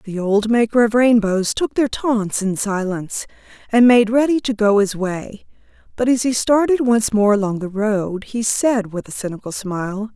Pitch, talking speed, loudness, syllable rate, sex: 220 Hz, 190 wpm, -18 LUFS, 4.6 syllables/s, female